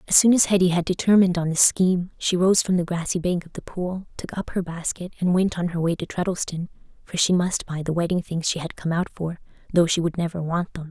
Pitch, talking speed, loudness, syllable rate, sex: 175 Hz, 260 wpm, -23 LUFS, 5.9 syllables/s, female